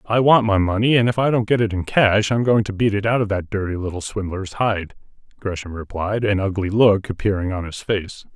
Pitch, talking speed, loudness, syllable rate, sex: 105 Hz, 235 wpm, -20 LUFS, 5.4 syllables/s, male